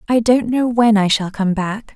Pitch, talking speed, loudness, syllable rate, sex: 220 Hz, 245 wpm, -16 LUFS, 4.5 syllables/s, female